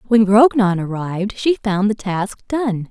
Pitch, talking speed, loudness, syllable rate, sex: 210 Hz, 165 wpm, -17 LUFS, 4.1 syllables/s, female